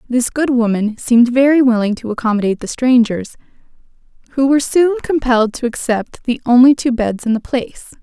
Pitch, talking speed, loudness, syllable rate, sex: 245 Hz, 170 wpm, -15 LUFS, 5.7 syllables/s, female